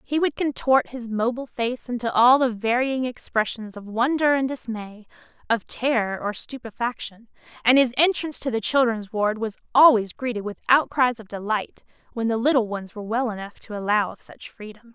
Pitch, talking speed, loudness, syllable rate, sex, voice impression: 235 Hz, 180 wpm, -23 LUFS, 5.2 syllables/s, female, very feminine, young, slightly adult-like, very thin, slightly tensed, slightly weak, bright, soft, clear, fluent, slightly raspy, very cute, intellectual, very refreshing, sincere, very calm, very friendly, very reassuring, very unique, elegant, slightly wild, very sweet, lively, kind, slightly intense, slightly sharp, slightly modest